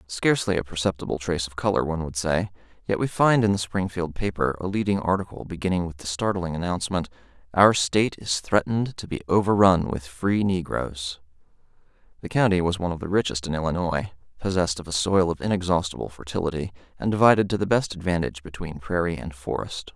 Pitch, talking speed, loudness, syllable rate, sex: 90 Hz, 180 wpm, -24 LUFS, 6.2 syllables/s, male